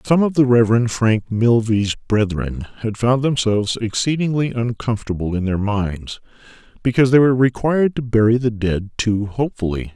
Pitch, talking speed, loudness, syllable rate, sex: 115 Hz, 150 wpm, -18 LUFS, 5.2 syllables/s, male